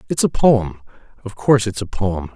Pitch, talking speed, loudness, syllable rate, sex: 110 Hz, 180 wpm, -18 LUFS, 5.6 syllables/s, male